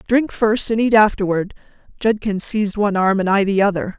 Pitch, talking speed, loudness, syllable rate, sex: 205 Hz, 195 wpm, -17 LUFS, 5.7 syllables/s, female